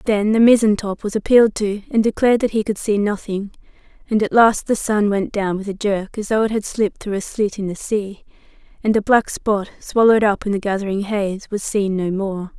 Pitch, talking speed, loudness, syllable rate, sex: 210 Hz, 230 wpm, -18 LUFS, 5.4 syllables/s, female